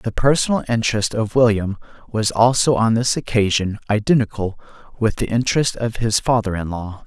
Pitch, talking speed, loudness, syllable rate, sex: 115 Hz, 160 wpm, -19 LUFS, 5.3 syllables/s, male